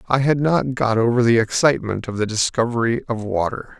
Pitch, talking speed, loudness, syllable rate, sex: 120 Hz, 190 wpm, -19 LUFS, 5.6 syllables/s, male